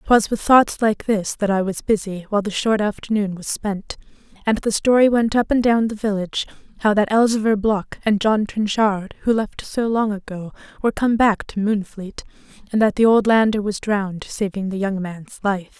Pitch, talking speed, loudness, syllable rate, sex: 210 Hz, 200 wpm, -20 LUFS, 5.0 syllables/s, female